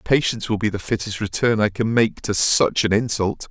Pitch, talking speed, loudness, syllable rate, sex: 105 Hz, 225 wpm, -20 LUFS, 5.2 syllables/s, male